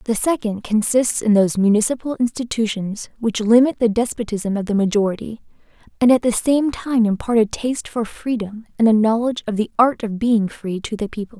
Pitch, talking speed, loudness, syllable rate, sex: 225 Hz, 190 wpm, -19 LUFS, 5.5 syllables/s, female